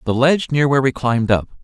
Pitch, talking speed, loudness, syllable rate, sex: 130 Hz, 255 wpm, -17 LUFS, 7.3 syllables/s, male